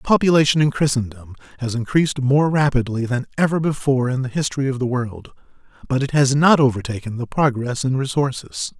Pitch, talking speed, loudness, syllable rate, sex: 135 Hz, 170 wpm, -19 LUFS, 5.8 syllables/s, male